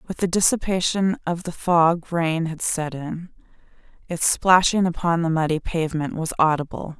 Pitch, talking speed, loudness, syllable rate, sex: 170 Hz, 155 wpm, -21 LUFS, 4.7 syllables/s, female